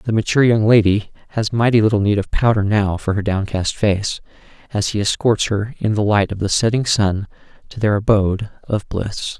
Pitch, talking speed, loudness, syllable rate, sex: 105 Hz, 200 wpm, -18 LUFS, 5.2 syllables/s, male